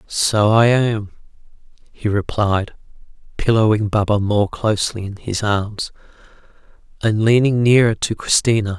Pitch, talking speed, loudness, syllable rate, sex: 105 Hz, 115 wpm, -17 LUFS, 4.4 syllables/s, male